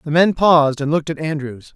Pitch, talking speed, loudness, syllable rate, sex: 155 Hz, 240 wpm, -17 LUFS, 6.1 syllables/s, male